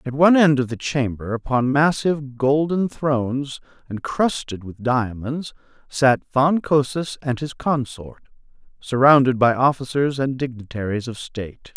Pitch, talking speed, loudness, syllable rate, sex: 135 Hz, 135 wpm, -20 LUFS, 4.5 syllables/s, male